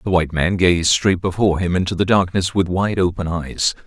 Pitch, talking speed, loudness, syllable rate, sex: 90 Hz, 215 wpm, -18 LUFS, 5.4 syllables/s, male